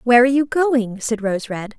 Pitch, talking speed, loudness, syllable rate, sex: 240 Hz, 235 wpm, -18 LUFS, 5.4 syllables/s, female